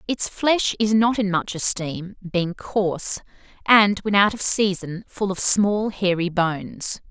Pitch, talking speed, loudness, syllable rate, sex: 195 Hz, 160 wpm, -21 LUFS, 3.8 syllables/s, female